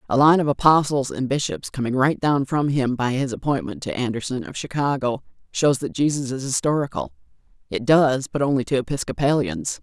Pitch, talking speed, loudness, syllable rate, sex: 140 Hz, 175 wpm, -22 LUFS, 5.4 syllables/s, female